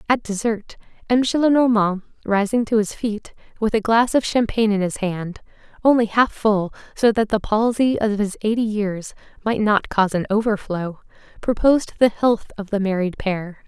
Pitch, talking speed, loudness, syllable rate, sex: 215 Hz, 160 wpm, -20 LUFS, 4.9 syllables/s, female